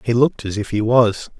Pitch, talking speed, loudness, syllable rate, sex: 110 Hz, 260 wpm, -18 LUFS, 5.7 syllables/s, male